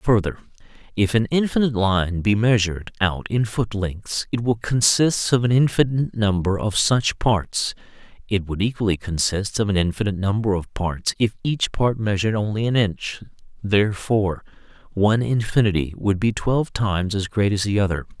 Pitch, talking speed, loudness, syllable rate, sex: 105 Hz, 165 wpm, -21 LUFS, 5.2 syllables/s, male